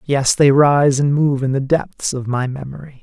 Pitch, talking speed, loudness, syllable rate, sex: 140 Hz, 220 wpm, -16 LUFS, 4.4 syllables/s, male